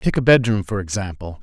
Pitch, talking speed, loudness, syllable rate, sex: 100 Hz, 210 wpm, -19 LUFS, 5.8 syllables/s, male